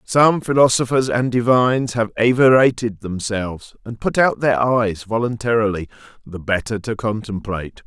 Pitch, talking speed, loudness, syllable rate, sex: 115 Hz, 130 wpm, -18 LUFS, 4.9 syllables/s, male